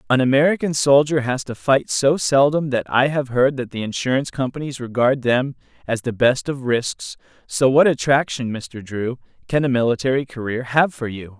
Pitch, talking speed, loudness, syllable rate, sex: 130 Hz, 185 wpm, -19 LUFS, 5.0 syllables/s, male